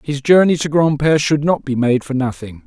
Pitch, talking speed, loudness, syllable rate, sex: 145 Hz, 225 wpm, -15 LUFS, 5.5 syllables/s, male